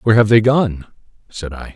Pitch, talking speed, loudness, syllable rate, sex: 105 Hz, 205 wpm, -14 LUFS, 5.4 syllables/s, male